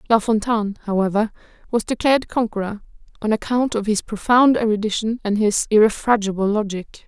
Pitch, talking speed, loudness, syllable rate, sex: 215 Hz, 135 wpm, -19 LUFS, 5.7 syllables/s, female